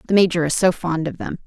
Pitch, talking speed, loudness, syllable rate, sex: 170 Hz, 285 wpm, -20 LUFS, 6.5 syllables/s, female